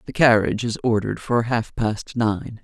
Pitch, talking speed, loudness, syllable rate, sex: 115 Hz, 180 wpm, -21 LUFS, 5.0 syllables/s, female